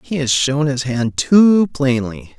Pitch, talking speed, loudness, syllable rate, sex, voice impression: 140 Hz, 175 wpm, -15 LUFS, 3.6 syllables/s, male, masculine, adult-like, cool, sincere, slightly calm, kind